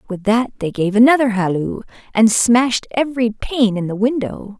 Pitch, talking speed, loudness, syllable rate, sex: 225 Hz, 170 wpm, -17 LUFS, 4.9 syllables/s, female